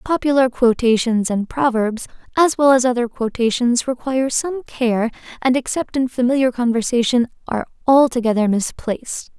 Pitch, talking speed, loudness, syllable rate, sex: 245 Hz, 130 wpm, -18 LUFS, 5.1 syllables/s, female